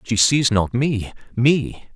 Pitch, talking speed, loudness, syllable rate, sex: 120 Hz, 125 wpm, -19 LUFS, 3.2 syllables/s, male